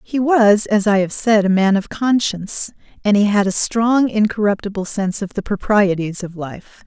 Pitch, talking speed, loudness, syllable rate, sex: 205 Hz, 190 wpm, -17 LUFS, 4.8 syllables/s, female